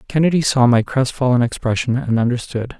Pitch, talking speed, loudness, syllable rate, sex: 125 Hz, 150 wpm, -17 LUFS, 5.7 syllables/s, male